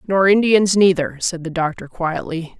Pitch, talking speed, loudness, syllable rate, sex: 180 Hz, 160 wpm, -17 LUFS, 4.6 syllables/s, female